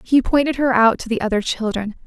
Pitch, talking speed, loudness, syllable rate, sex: 235 Hz, 230 wpm, -18 LUFS, 5.8 syllables/s, female